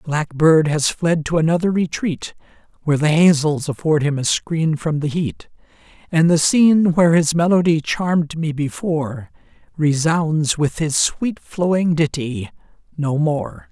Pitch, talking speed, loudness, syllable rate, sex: 160 Hz, 150 wpm, -18 LUFS, 4.3 syllables/s, male